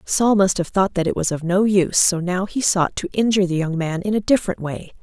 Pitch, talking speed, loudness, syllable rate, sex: 185 Hz, 275 wpm, -19 LUFS, 5.8 syllables/s, female